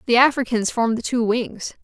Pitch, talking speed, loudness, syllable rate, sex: 235 Hz, 195 wpm, -20 LUFS, 5.6 syllables/s, female